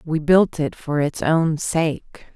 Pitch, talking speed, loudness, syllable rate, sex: 160 Hz, 180 wpm, -20 LUFS, 3.1 syllables/s, female